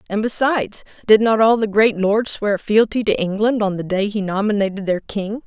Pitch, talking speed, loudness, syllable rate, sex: 210 Hz, 210 wpm, -18 LUFS, 5.2 syllables/s, female